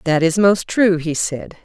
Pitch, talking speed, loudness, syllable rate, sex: 175 Hz, 220 wpm, -17 LUFS, 4.1 syllables/s, female